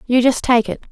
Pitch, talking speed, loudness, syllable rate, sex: 240 Hz, 260 wpm, -16 LUFS, 5.8 syllables/s, female